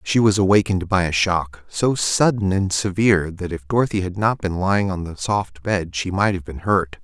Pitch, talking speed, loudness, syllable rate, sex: 95 Hz, 220 wpm, -20 LUFS, 5.1 syllables/s, male